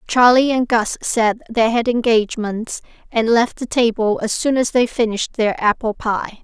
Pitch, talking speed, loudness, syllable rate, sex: 230 Hz, 175 wpm, -17 LUFS, 4.6 syllables/s, female